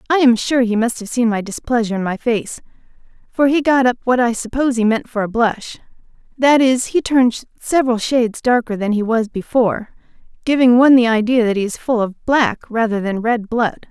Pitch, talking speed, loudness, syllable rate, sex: 235 Hz, 210 wpm, -16 LUFS, 5.5 syllables/s, female